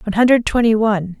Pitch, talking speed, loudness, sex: 215 Hz, 200 wpm, -15 LUFS, female